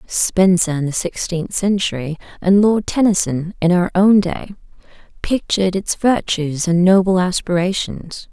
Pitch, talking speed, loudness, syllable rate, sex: 185 Hz, 130 wpm, -17 LUFS, 4.3 syllables/s, female